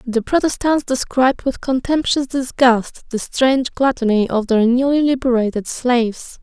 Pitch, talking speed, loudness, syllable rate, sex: 250 Hz, 130 wpm, -17 LUFS, 4.6 syllables/s, female